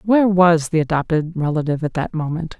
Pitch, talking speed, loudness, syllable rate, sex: 165 Hz, 185 wpm, -18 LUFS, 6.0 syllables/s, female